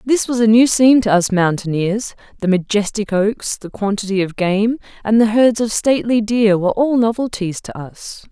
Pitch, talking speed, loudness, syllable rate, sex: 215 Hz, 190 wpm, -16 LUFS, 5.0 syllables/s, female